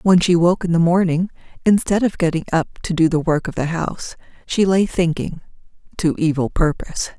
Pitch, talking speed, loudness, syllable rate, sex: 170 Hz, 185 wpm, -19 LUFS, 5.5 syllables/s, female